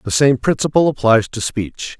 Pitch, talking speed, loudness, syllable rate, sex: 120 Hz, 180 wpm, -16 LUFS, 4.8 syllables/s, male